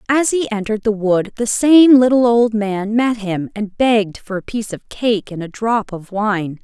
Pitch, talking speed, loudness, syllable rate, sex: 215 Hz, 215 wpm, -16 LUFS, 4.6 syllables/s, female